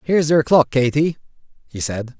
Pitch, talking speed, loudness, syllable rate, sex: 140 Hz, 165 wpm, -18 LUFS, 5.0 syllables/s, male